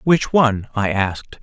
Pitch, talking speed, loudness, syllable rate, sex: 120 Hz, 170 wpm, -18 LUFS, 4.7 syllables/s, male